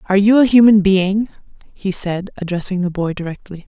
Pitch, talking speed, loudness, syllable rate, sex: 195 Hz, 175 wpm, -15 LUFS, 5.4 syllables/s, female